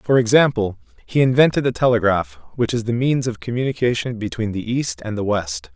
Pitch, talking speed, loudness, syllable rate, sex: 120 Hz, 190 wpm, -19 LUFS, 5.4 syllables/s, male